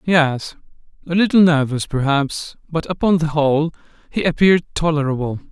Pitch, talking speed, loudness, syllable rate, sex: 155 Hz, 130 wpm, -18 LUFS, 5.3 syllables/s, male